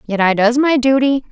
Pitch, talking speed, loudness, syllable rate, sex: 245 Hz, 230 wpm, -14 LUFS, 5.3 syllables/s, female